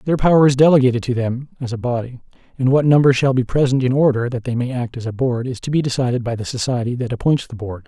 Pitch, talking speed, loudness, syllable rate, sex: 125 Hz, 265 wpm, -18 LUFS, 6.5 syllables/s, male